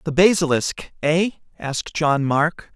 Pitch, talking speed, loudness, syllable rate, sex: 160 Hz, 130 wpm, -20 LUFS, 4.0 syllables/s, male